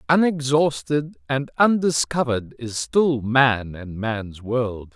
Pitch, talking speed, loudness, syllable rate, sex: 130 Hz, 110 wpm, -21 LUFS, 3.5 syllables/s, male